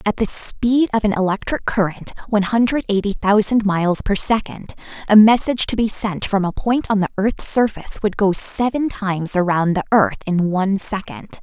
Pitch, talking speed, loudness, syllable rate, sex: 205 Hz, 190 wpm, -18 LUFS, 5.2 syllables/s, female